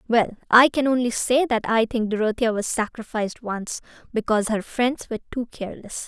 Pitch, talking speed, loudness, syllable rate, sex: 230 Hz, 180 wpm, -22 LUFS, 5.5 syllables/s, female